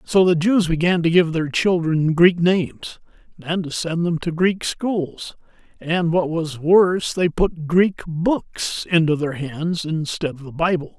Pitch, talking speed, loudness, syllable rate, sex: 170 Hz, 175 wpm, -20 LUFS, 3.9 syllables/s, male